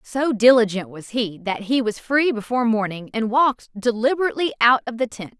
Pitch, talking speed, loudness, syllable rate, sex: 235 Hz, 190 wpm, -20 LUFS, 5.6 syllables/s, female